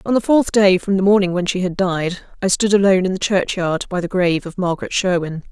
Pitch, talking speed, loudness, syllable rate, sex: 185 Hz, 250 wpm, -17 LUFS, 6.1 syllables/s, female